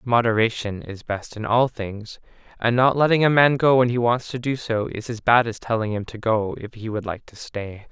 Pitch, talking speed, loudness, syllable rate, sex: 115 Hz, 245 wpm, -21 LUFS, 5.0 syllables/s, male